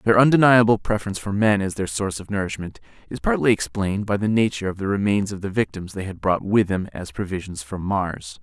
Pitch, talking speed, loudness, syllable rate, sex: 100 Hz, 220 wpm, -22 LUFS, 6.1 syllables/s, male